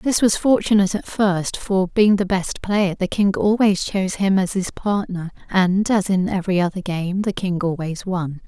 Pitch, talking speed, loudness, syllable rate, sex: 190 Hz, 200 wpm, -20 LUFS, 4.6 syllables/s, female